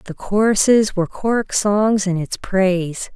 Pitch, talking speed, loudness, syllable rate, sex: 200 Hz, 150 wpm, -18 LUFS, 4.4 syllables/s, female